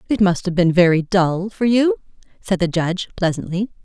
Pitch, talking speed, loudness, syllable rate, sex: 185 Hz, 190 wpm, -18 LUFS, 5.3 syllables/s, female